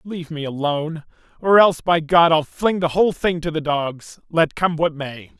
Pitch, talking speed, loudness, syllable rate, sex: 160 Hz, 210 wpm, -19 LUFS, 5.0 syllables/s, male